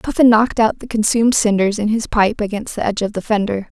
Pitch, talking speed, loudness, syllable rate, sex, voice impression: 215 Hz, 235 wpm, -16 LUFS, 6.2 syllables/s, female, feminine, slightly young, slightly relaxed, soft, slightly clear, raspy, intellectual, calm, slightly friendly, reassuring, elegant, slightly sharp